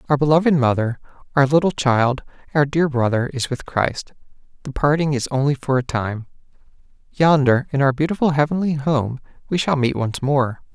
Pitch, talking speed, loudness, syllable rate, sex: 140 Hz, 165 wpm, -19 LUFS, 5.1 syllables/s, male